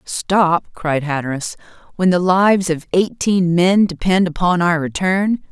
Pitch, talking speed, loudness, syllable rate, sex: 180 Hz, 140 wpm, -16 LUFS, 4.1 syllables/s, female